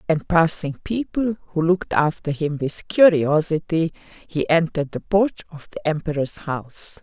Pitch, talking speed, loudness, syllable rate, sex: 165 Hz, 145 wpm, -21 LUFS, 4.5 syllables/s, female